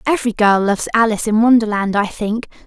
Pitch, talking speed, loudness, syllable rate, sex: 220 Hz, 180 wpm, -16 LUFS, 6.4 syllables/s, female